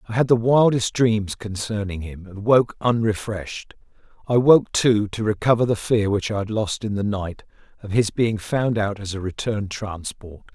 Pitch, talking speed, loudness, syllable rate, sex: 105 Hz, 190 wpm, -21 LUFS, 4.7 syllables/s, male